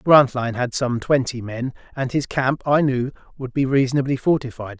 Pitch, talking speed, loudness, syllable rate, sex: 130 Hz, 175 wpm, -21 LUFS, 5.2 syllables/s, male